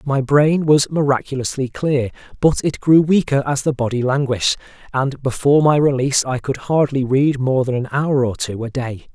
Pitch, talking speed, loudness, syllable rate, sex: 135 Hz, 190 wpm, -18 LUFS, 5.1 syllables/s, male